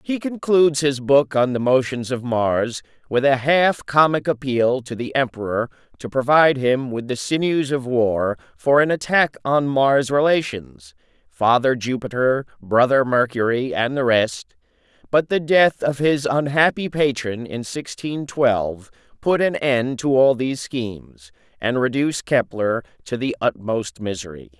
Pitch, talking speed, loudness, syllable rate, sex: 130 Hz, 145 wpm, -20 LUFS, 4.3 syllables/s, male